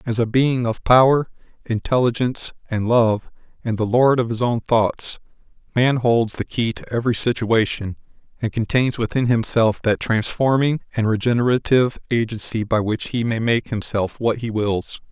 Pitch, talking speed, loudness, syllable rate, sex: 115 Hz, 160 wpm, -20 LUFS, 4.9 syllables/s, male